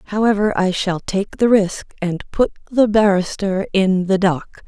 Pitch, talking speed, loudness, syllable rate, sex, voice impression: 195 Hz, 165 wpm, -18 LUFS, 4.0 syllables/s, female, feminine, adult-like, tensed, slightly weak, slightly dark, clear, intellectual, calm, reassuring, elegant, kind, modest